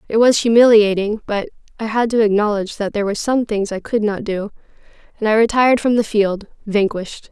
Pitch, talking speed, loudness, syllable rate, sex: 215 Hz, 195 wpm, -17 LUFS, 6.1 syllables/s, female